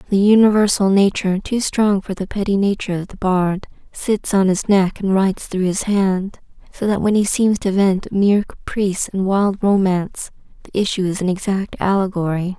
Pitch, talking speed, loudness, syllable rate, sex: 195 Hz, 190 wpm, -18 LUFS, 5.3 syllables/s, female